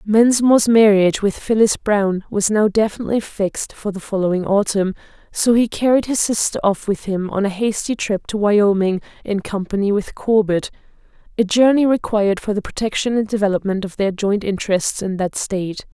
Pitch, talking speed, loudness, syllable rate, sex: 205 Hz, 170 wpm, -18 LUFS, 5.4 syllables/s, female